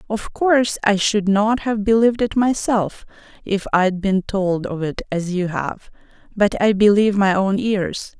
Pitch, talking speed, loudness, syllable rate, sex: 205 Hz, 175 wpm, -19 LUFS, 4.3 syllables/s, female